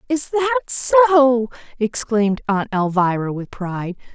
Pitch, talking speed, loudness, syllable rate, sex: 235 Hz, 115 wpm, -18 LUFS, 4.9 syllables/s, female